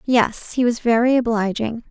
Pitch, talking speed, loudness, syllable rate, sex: 235 Hz, 155 wpm, -19 LUFS, 4.6 syllables/s, female